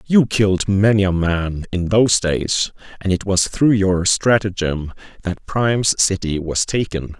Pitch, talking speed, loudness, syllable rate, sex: 95 Hz, 160 wpm, -18 LUFS, 4.1 syllables/s, male